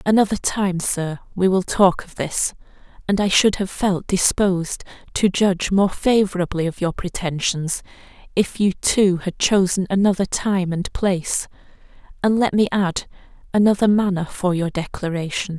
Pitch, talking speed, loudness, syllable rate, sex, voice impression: 190 Hz, 140 wpm, -20 LUFS, 4.6 syllables/s, female, feminine, adult-like, slightly clear, slightly sincere, calm, friendly